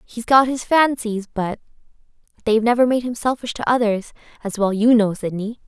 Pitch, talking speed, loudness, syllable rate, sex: 225 Hz, 180 wpm, -19 LUFS, 5.4 syllables/s, female